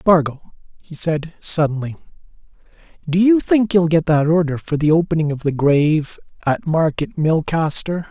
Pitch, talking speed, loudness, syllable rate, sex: 160 Hz, 150 wpm, -17 LUFS, 4.7 syllables/s, male